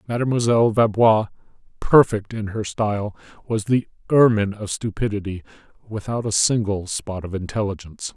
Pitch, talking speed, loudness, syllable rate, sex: 105 Hz, 125 wpm, -21 LUFS, 5.4 syllables/s, male